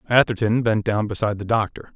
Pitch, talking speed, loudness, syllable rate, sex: 110 Hz, 185 wpm, -21 LUFS, 6.3 syllables/s, male